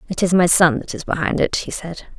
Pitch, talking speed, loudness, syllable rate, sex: 170 Hz, 275 wpm, -18 LUFS, 5.7 syllables/s, female